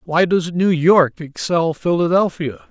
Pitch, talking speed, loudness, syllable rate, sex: 170 Hz, 135 wpm, -17 LUFS, 4.0 syllables/s, male